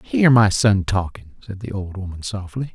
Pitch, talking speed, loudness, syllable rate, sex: 100 Hz, 195 wpm, -19 LUFS, 4.6 syllables/s, male